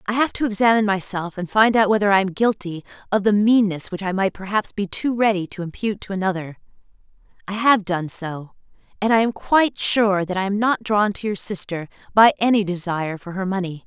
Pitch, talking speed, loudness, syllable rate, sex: 200 Hz, 210 wpm, -20 LUFS, 5.8 syllables/s, female